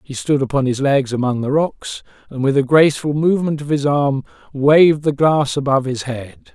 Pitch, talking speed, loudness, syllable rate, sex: 135 Hz, 200 wpm, -16 LUFS, 5.3 syllables/s, male